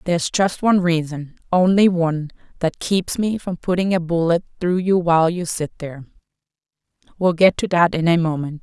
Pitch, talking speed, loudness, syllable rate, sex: 175 Hz, 180 wpm, -19 LUFS, 5.4 syllables/s, female